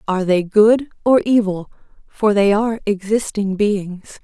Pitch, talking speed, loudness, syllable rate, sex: 205 Hz, 140 wpm, -17 LUFS, 4.3 syllables/s, female